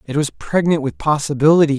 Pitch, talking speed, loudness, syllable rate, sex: 145 Hz, 170 wpm, -17 LUFS, 5.8 syllables/s, male